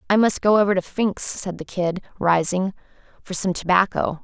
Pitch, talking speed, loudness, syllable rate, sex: 185 Hz, 185 wpm, -21 LUFS, 5.0 syllables/s, female